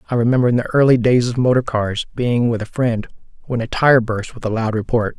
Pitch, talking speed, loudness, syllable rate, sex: 120 Hz, 245 wpm, -17 LUFS, 6.1 syllables/s, male